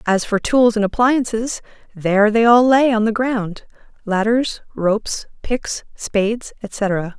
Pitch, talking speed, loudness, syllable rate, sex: 220 Hz, 135 wpm, -18 LUFS, 3.9 syllables/s, female